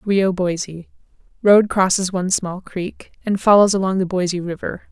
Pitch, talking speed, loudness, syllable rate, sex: 185 Hz, 145 wpm, -18 LUFS, 4.9 syllables/s, female